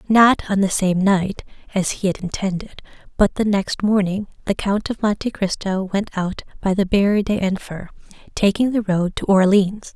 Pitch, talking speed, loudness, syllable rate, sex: 195 Hz, 175 wpm, -19 LUFS, 4.6 syllables/s, female